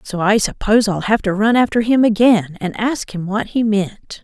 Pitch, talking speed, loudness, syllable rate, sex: 210 Hz, 225 wpm, -16 LUFS, 4.9 syllables/s, female